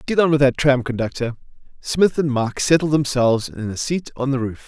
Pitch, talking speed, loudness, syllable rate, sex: 135 Hz, 230 wpm, -19 LUFS, 5.9 syllables/s, male